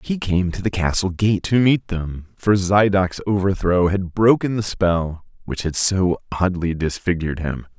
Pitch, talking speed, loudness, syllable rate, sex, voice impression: 95 Hz, 170 wpm, -20 LUFS, 4.4 syllables/s, male, very masculine, middle-aged, very thick, slightly tensed, slightly powerful, bright, soft, slightly muffled, slightly fluent, slightly raspy, cool, intellectual, slightly refreshing, sincere, very calm, very mature, friendly, reassuring, very unique, slightly elegant, wild, sweet, lively, kind